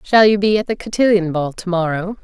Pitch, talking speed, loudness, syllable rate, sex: 190 Hz, 215 wpm, -16 LUFS, 5.7 syllables/s, female